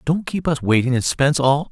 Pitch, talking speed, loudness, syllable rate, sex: 140 Hz, 245 wpm, -19 LUFS, 6.2 syllables/s, male